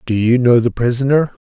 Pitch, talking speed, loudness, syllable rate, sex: 125 Hz, 210 wpm, -14 LUFS, 5.7 syllables/s, male